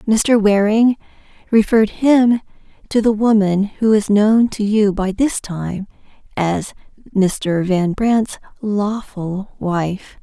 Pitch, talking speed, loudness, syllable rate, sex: 210 Hz, 125 wpm, -17 LUFS, 3.2 syllables/s, female